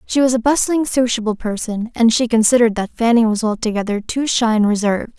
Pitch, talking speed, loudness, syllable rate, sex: 230 Hz, 195 wpm, -16 LUFS, 6.0 syllables/s, female